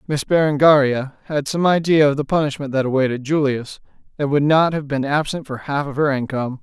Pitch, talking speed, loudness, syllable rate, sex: 145 Hz, 200 wpm, -18 LUFS, 5.7 syllables/s, male